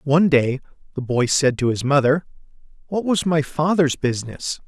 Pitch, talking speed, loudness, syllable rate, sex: 145 Hz, 165 wpm, -20 LUFS, 5.1 syllables/s, male